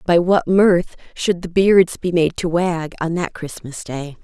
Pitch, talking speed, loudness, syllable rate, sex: 170 Hz, 200 wpm, -18 LUFS, 3.9 syllables/s, female